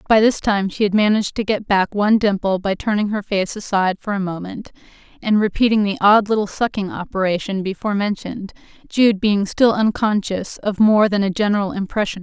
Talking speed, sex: 200 wpm, female